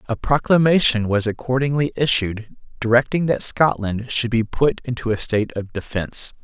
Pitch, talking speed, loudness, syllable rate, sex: 120 Hz, 150 wpm, -20 LUFS, 5.1 syllables/s, male